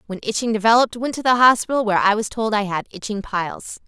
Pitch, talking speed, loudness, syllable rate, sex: 220 Hz, 235 wpm, -19 LUFS, 6.7 syllables/s, female